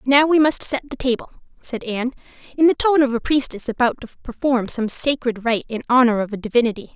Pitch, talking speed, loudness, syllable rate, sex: 250 Hz, 215 wpm, -19 LUFS, 5.8 syllables/s, female